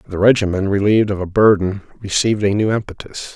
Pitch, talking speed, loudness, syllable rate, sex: 100 Hz, 180 wpm, -16 LUFS, 6.4 syllables/s, male